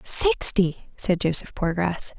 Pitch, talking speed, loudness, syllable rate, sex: 180 Hz, 110 wpm, -21 LUFS, 3.6 syllables/s, female